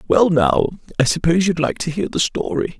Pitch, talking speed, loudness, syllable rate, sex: 150 Hz, 215 wpm, -18 LUFS, 5.7 syllables/s, male